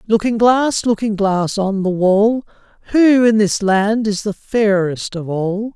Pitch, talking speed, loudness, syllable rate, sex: 210 Hz, 165 wpm, -16 LUFS, 3.7 syllables/s, male